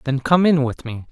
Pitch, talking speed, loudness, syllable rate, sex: 140 Hz, 270 wpm, -18 LUFS, 5.2 syllables/s, male